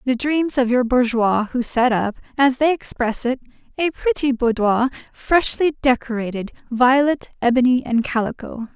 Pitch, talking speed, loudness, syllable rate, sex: 250 Hz, 145 wpm, -19 LUFS, 4.6 syllables/s, female